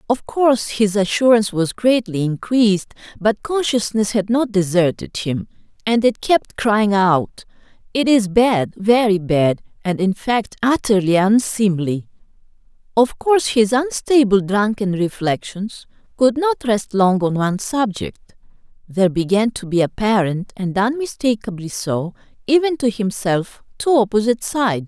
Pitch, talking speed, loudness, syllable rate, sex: 215 Hz, 135 wpm, -18 LUFS, 4.4 syllables/s, female